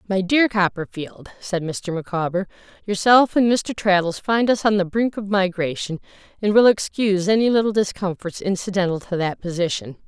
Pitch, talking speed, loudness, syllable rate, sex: 195 Hz, 160 wpm, -20 LUFS, 5.1 syllables/s, female